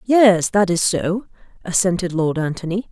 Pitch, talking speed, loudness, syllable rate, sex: 185 Hz, 145 wpm, -18 LUFS, 4.6 syllables/s, female